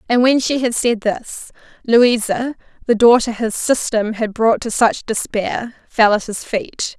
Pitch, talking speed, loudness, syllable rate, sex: 230 Hz, 170 wpm, -17 LUFS, 4.0 syllables/s, female